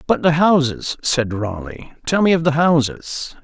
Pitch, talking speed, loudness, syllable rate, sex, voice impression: 145 Hz, 175 wpm, -17 LUFS, 4.3 syllables/s, male, masculine, slightly middle-aged, cool, sincere, slightly wild